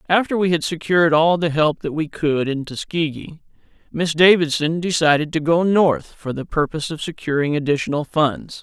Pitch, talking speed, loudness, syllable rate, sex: 160 Hz, 175 wpm, -19 LUFS, 5.1 syllables/s, male